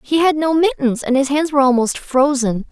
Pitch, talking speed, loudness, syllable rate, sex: 275 Hz, 220 wpm, -16 LUFS, 5.4 syllables/s, female